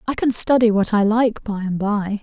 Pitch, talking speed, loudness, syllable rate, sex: 215 Hz, 245 wpm, -18 LUFS, 4.8 syllables/s, female